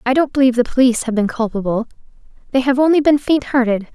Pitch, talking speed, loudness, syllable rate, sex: 250 Hz, 215 wpm, -16 LUFS, 6.9 syllables/s, female